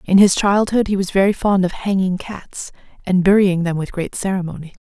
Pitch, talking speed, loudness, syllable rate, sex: 190 Hz, 200 wpm, -17 LUFS, 5.3 syllables/s, female